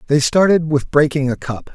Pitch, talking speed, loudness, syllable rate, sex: 150 Hz, 205 wpm, -16 LUFS, 5.2 syllables/s, male